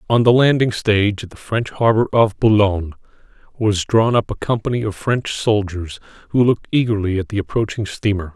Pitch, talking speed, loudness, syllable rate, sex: 105 Hz, 180 wpm, -18 LUFS, 5.5 syllables/s, male